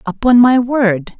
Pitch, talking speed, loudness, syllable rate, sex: 230 Hz, 150 wpm, -12 LUFS, 3.9 syllables/s, female